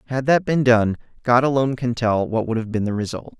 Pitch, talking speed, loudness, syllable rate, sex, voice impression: 120 Hz, 245 wpm, -20 LUFS, 5.8 syllables/s, male, masculine, adult-like, tensed, powerful, clear, fluent, cool, intellectual, calm, friendly, reassuring, wild, slightly kind